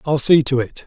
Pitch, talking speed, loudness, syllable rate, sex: 140 Hz, 275 wpm, -16 LUFS, 5.3 syllables/s, male